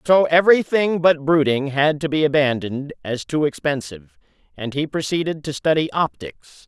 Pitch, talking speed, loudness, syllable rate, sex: 150 Hz, 155 wpm, -19 LUFS, 5.1 syllables/s, male